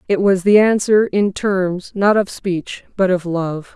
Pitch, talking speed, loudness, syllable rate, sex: 190 Hz, 190 wpm, -17 LUFS, 3.8 syllables/s, female